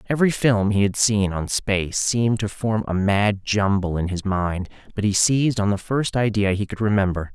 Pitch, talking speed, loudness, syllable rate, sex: 105 Hz, 210 wpm, -21 LUFS, 5.1 syllables/s, male